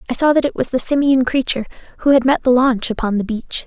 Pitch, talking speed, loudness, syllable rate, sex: 255 Hz, 260 wpm, -16 LUFS, 6.5 syllables/s, female